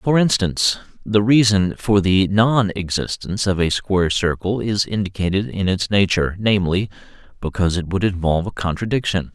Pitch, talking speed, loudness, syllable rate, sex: 95 Hz, 150 wpm, -19 LUFS, 5.4 syllables/s, male